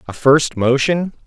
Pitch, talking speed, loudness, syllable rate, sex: 140 Hz, 145 wpm, -15 LUFS, 4.0 syllables/s, male